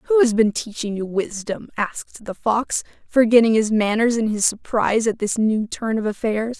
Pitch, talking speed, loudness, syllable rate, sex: 220 Hz, 190 wpm, -20 LUFS, 4.8 syllables/s, female